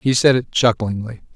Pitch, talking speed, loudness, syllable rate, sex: 115 Hz, 175 wpm, -18 LUFS, 5.0 syllables/s, male